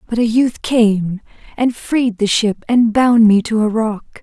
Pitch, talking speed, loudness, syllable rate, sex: 225 Hz, 200 wpm, -15 LUFS, 4.1 syllables/s, female